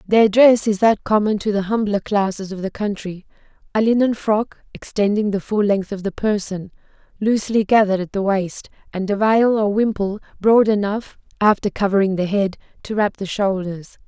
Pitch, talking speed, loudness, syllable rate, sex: 205 Hz, 175 wpm, -19 LUFS, 5.1 syllables/s, female